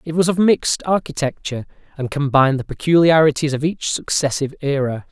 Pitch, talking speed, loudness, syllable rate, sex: 150 Hz, 155 wpm, -18 LUFS, 6.0 syllables/s, male